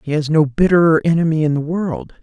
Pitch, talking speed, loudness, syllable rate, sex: 155 Hz, 215 wpm, -16 LUFS, 5.6 syllables/s, male